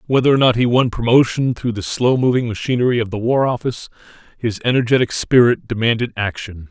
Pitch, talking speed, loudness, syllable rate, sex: 120 Hz, 180 wpm, -17 LUFS, 6.0 syllables/s, male